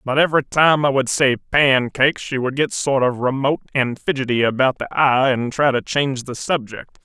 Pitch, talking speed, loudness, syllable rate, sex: 135 Hz, 205 wpm, -18 LUFS, 5.4 syllables/s, male